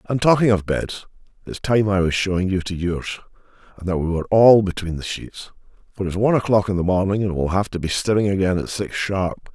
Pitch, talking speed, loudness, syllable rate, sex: 95 Hz, 235 wpm, -20 LUFS, 5.9 syllables/s, male